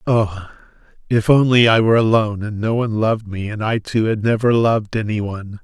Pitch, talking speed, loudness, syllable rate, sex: 110 Hz, 190 wpm, -17 LUFS, 5.8 syllables/s, male